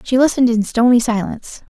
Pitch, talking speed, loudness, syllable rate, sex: 240 Hz, 170 wpm, -15 LUFS, 6.4 syllables/s, female